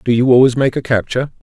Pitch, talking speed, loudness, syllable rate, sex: 125 Hz, 235 wpm, -14 LUFS, 6.9 syllables/s, male